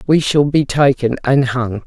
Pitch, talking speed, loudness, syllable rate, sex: 135 Hz, 195 wpm, -15 LUFS, 4.3 syllables/s, female